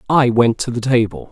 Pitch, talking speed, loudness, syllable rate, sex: 120 Hz, 230 wpm, -16 LUFS, 5.3 syllables/s, male